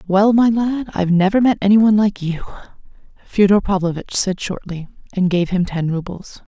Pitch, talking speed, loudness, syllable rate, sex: 195 Hz, 175 wpm, -17 LUFS, 5.5 syllables/s, female